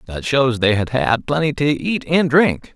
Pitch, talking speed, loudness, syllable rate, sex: 135 Hz, 220 wpm, -17 LUFS, 4.3 syllables/s, male